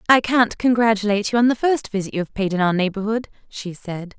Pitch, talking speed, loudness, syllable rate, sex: 210 Hz, 230 wpm, -20 LUFS, 6.1 syllables/s, female